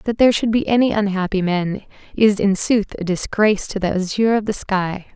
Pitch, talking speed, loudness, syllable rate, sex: 205 Hz, 210 wpm, -18 LUFS, 5.4 syllables/s, female